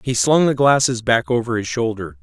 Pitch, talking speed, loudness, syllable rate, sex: 115 Hz, 215 wpm, -17 LUFS, 5.2 syllables/s, male